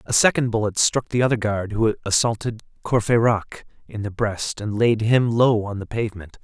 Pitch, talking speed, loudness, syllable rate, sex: 110 Hz, 195 wpm, -21 LUFS, 5.5 syllables/s, male